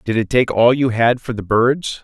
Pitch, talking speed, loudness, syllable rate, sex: 120 Hz, 265 wpm, -16 LUFS, 4.7 syllables/s, male